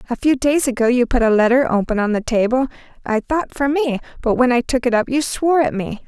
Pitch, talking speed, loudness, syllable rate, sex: 250 Hz, 255 wpm, -18 LUFS, 6.1 syllables/s, female